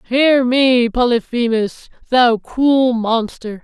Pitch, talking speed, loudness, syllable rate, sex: 245 Hz, 100 wpm, -15 LUFS, 3.1 syllables/s, female